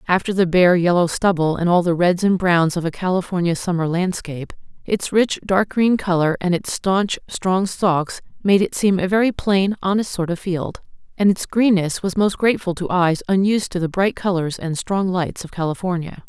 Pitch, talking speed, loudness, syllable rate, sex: 180 Hz, 200 wpm, -19 LUFS, 5.0 syllables/s, female